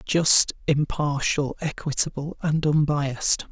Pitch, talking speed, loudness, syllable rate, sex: 150 Hz, 85 wpm, -23 LUFS, 3.8 syllables/s, male